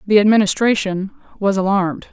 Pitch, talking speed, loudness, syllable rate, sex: 200 Hz, 115 wpm, -17 LUFS, 5.5 syllables/s, female